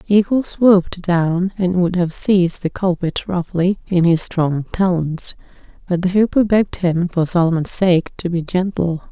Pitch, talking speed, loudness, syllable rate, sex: 180 Hz, 170 wpm, -17 LUFS, 4.6 syllables/s, female